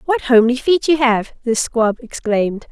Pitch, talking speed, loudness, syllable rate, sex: 245 Hz, 175 wpm, -16 LUFS, 5.0 syllables/s, female